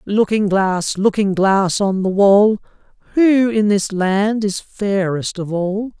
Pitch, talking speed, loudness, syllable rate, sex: 200 Hz, 150 wpm, -16 LUFS, 3.4 syllables/s, male